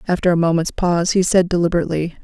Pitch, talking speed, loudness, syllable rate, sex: 175 Hz, 190 wpm, -17 LUFS, 7.5 syllables/s, female